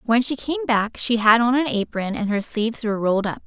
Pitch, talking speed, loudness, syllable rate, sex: 230 Hz, 260 wpm, -21 LUFS, 5.9 syllables/s, female